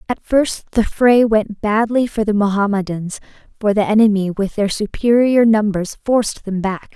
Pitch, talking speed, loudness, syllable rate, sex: 210 Hz, 165 wpm, -16 LUFS, 4.6 syllables/s, female